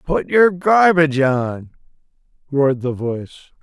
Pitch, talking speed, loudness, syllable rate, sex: 145 Hz, 115 wpm, -16 LUFS, 4.6 syllables/s, male